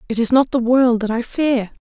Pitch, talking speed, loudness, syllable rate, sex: 240 Hz, 265 wpm, -17 LUFS, 5.1 syllables/s, female